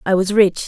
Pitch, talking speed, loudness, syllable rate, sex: 195 Hz, 265 wpm, -15 LUFS, 5.7 syllables/s, female